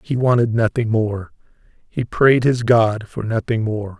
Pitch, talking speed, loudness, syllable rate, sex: 115 Hz, 165 wpm, -18 LUFS, 4.2 syllables/s, male